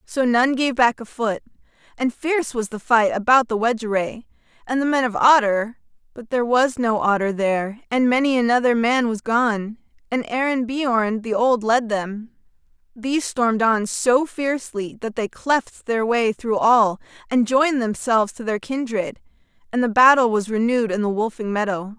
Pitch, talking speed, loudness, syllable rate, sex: 235 Hz, 170 wpm, -20 LUFS, 4.9 syllables/s, female